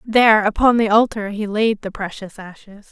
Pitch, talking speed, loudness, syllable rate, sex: 210 Hz, 185 wpm, -17 LUFS, 5.0 syllables/s, female